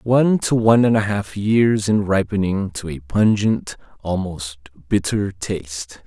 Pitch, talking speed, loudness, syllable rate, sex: 100 Hz, 150 wpm, -19 LUFS, 4.2 syllables/s, male